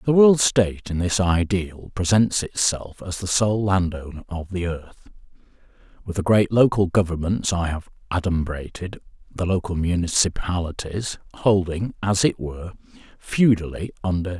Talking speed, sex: 145 wpm, male